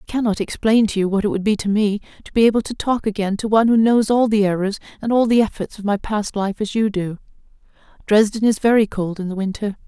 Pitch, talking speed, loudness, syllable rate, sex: 210 Hz, 255 wpm, -19 LUFS, 6.2 syllables/s, female